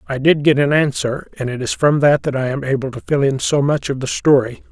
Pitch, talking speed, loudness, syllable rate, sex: 140 Hz, 280 wpm, -17 LUFS, 5.7 syllables/s, male